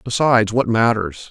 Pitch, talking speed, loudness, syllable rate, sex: 110 Hz, 140 wpm, -17 LUFS, 5.0 syllables/s, male